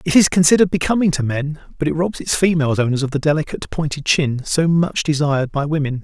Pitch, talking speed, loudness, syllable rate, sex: 155 Hz, 210 wpm, -18 LUFS, 6.3 syllables/s, male